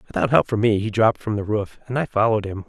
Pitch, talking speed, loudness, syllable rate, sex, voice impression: 105 Hz, 290 wpm, -21 LUFS, 7.0 syllables/s, male, masculine, middle-aged, tensed, powerful, bright, slightly hard, slightly muffled, mature, friendly, slightly reassuring, wild, lively, strict, intense